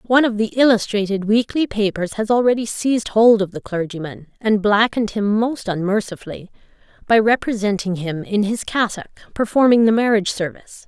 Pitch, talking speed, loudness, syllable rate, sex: 210 Hz, 155 wpm, -18 LUFS, 5.6 syllables/s, female